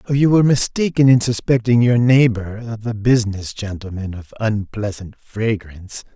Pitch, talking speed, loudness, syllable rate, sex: 110 Hz, 125 wpm, -17 LUFS, 4.6 syllables/s, male